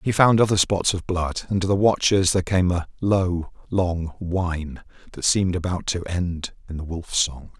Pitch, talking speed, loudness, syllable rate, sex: 90 Hz, 195 wpm, -22 LUFS, 4.7 syllables/s, male